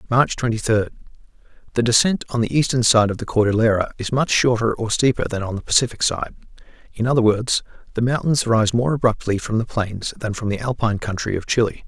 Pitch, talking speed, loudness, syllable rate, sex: 115 Hz, 195 wpm, -20 LUFS, 5.9 syllables/s, male